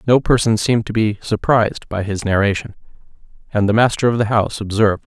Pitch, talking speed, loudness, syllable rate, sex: 110 Hz, 185 wpm, -17 LUFS, 6.2 syllables/s, male